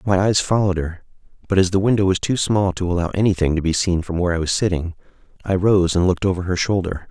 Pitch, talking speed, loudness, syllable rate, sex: 90 Hz, 245 wpm, -19 LUFS, 6.6 syllables/s, male